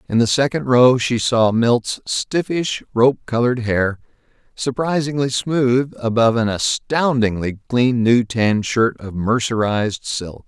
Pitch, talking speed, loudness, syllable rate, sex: 120 Hz, 125 wpm, -18 LUFS, 4.1 syllables/s, male